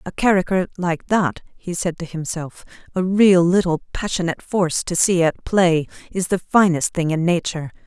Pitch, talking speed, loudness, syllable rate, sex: 175 Hz, 170 wpm, -19 LUFS, 5.1 syllables/s, female